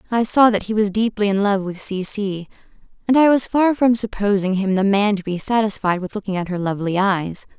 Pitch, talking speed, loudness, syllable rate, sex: 205 Hz, 230 wpm, -19 LUFS, 5.5 syllables/s, female